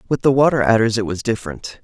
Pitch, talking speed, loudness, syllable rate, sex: 115 Hz, 230 wpm, -17 LUFS, 6.7 syllables/s, male